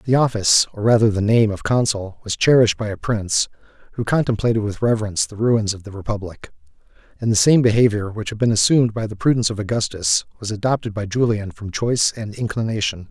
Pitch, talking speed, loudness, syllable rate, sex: 110 Hz, 195 wpm, -19 LUFS, 6.3 syllables/s, male